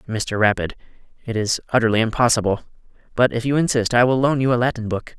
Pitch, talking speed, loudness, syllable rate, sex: 120 Hz, 195 wpm, -19 LUFS, 6.4 syllables/s, male